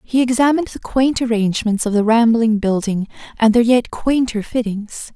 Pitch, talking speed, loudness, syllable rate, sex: 230 Hz, 165 wpm, -17 LUFS, 5.1 syllables/s, female